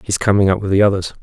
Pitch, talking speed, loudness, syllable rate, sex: 100 Hz, 345 wpm, -15 LUFS, 8.4 syllables/s, male